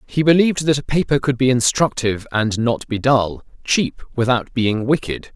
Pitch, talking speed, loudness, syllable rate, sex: 125 Hz, 180 wpm, -18 LUFS, 5.0 syllables/s, male